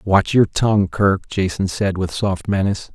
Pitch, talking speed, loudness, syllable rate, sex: 95 Hz, 185 wpm, -18 LUFS, 4.5 syllables/s, male